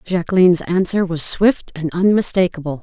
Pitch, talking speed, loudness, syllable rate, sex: 180 Hz, 125 wpm, -16 LUFS, 5.2 syllables/s, female